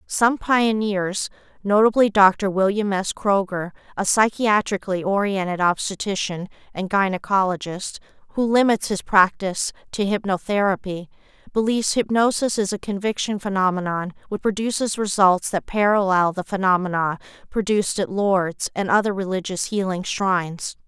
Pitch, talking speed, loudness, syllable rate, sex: 195 Hz, 115 wpm, -21 LUFS, 4.9 syllables/s, female